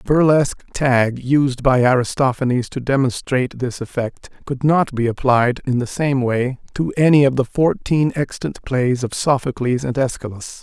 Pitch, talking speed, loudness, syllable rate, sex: 130 Hz, 165 wpm, -18 LUFS, 4.8 syllables/s, male